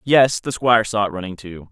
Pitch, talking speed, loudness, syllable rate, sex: 110 Hz, 245 wpm, -18 LUFS, 5.6 syllables/s, male